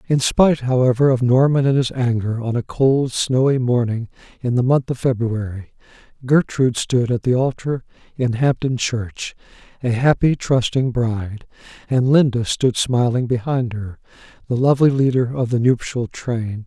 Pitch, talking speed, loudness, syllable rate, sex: 125 Hz, 155 wpm, -19 LUFS, 4.7 syllables/s, male